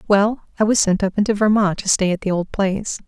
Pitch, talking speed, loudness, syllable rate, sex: 200 Hz, 255 wpm, -18 LUFS, 5.9 syllables/s, female